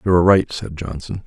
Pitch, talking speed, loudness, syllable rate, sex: 85 Hz, 235 wpm, -19 LUFS, 6.0 syllables/s, male